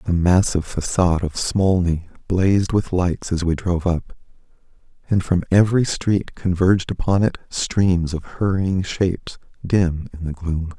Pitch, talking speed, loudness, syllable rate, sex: 90 Hz, 150 wpm, -20 LUFS, 4.6 syllables/s, male